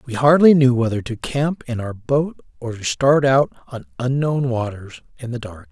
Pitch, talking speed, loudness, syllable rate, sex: 125 Hz, 200 wpm, -18 LUFS, 4.7 syllables/s, male